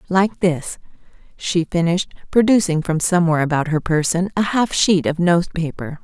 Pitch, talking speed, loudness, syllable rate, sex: 170 Hz, 160 wpm, -18 LUFS, 5.1 syllables/s, female